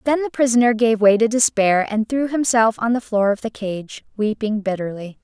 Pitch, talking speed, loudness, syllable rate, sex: 225 Hz, 205 wpm, -18 LUFS, 5.1 syllables/s, female